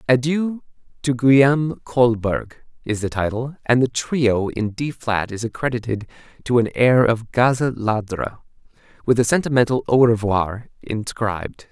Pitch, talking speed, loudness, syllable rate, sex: 120 Hz, 140 wpm, -20 LUFS, 4.5 syllables/s, male